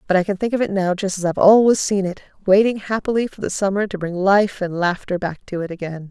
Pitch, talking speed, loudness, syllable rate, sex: 195 Hz, 265 wpm, -19 LUFS, 6.2 syllables/s, female